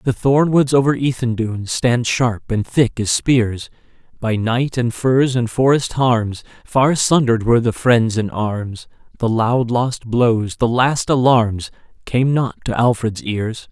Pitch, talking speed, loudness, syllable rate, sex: 120 Hz, 160 wpm, -17 LUFS, 4.0 syllables/s, male